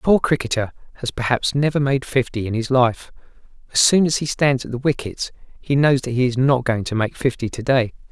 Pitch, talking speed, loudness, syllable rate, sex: 130 Hz, 230 wpm, -20 LUFS, 5.7 syllables/s, male